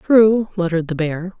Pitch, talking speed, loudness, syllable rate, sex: 185 Hz, 170 wpm, -18 LUFS, 5.3 syllables/s, female